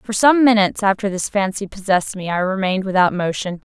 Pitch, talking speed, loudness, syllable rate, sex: 195 Hz, 195 wpm, -18 LUFS, 6.1 syllables/s, female